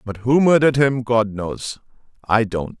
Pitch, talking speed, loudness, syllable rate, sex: 120 Hz, 150 wpm, -18 LUFS, 4.4 syllables/s, male